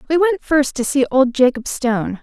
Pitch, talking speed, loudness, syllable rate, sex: 275 Hz, 215 wpm, -17 LUFS, 5.1 syllables/s, female